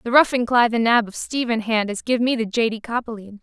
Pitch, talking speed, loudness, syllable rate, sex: 230 Hz, 245 wpm, -20 LUFS, 5.7 syllables/s, female